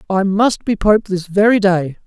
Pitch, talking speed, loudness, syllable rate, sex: 200 Hz, 205 wpm, -15 LUFS, 4.5 syllables/s, male